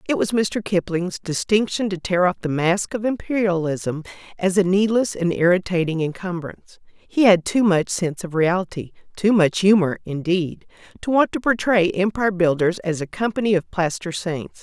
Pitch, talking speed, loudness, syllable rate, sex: 185 Hz, 160 wpm, -20 LUFS, 5.0 syllables/s, female